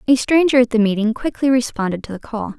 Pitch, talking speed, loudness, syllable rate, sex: 240 Hz, 230 wpm, -17 LUFS, 6.2 syllables/s, female